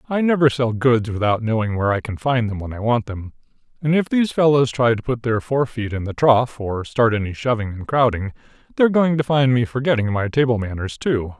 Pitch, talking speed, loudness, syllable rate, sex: 120 Hz, 225 wpm, -19 LUFS, 5.7 syllables/s, male